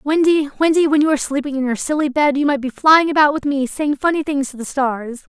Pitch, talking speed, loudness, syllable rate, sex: 285 Hz, 260 wpm, -17 LUFS, 5.9 syllables/s, female